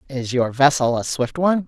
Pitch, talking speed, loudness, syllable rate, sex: 140 Hz, 215 wpm, -19 LUFS, 5.4 syllables/s, female